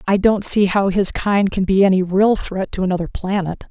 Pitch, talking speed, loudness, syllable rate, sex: 195 Hz, 225 wpm, -17 LUFS, 5.1 syllables/s, female